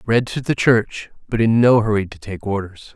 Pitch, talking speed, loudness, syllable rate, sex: 110 Hz, 225 wpm, -18 LUFS, 4.7 syllables/s, male